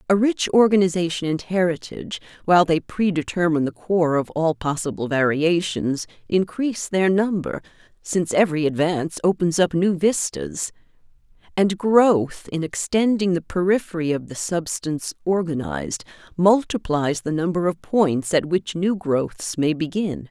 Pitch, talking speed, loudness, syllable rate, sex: 170 Hz, 135 wpm, -21 LUFS, 4.8 syllables/s, female